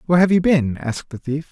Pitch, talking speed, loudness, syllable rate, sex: 150 Hz, 275 wpm, -19 LUFS, 6.7 syllables/s, male